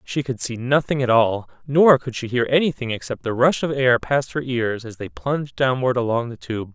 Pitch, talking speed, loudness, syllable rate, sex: 125 Hz, 230 wpm, -21 LUFS, 5.1 syllables/s, male